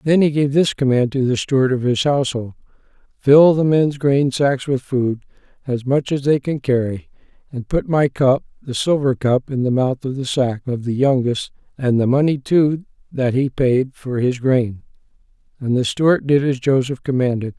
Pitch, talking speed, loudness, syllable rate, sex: 135 Hz, 195 wpm, -18 LUFS, 4.8 syllables/s, male